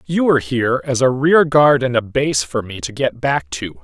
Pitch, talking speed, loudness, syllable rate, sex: 125 Hz, 250 wpm, -16 LUFS, 4.9 syllables/s, male